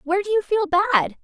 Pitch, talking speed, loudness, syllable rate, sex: 370 Hz, 245 wpm, -20 LUFS, 7.5 syllables/s, female